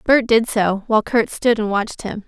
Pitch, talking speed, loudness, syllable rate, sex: 220 Hz, 235 wpm, -18 LUFS, 5.2 syllables/s, female